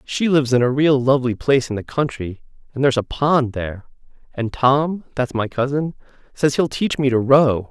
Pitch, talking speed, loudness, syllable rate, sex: 130 Hz, 200 wpm, -19 LUFS, 5.2 syllables/s, male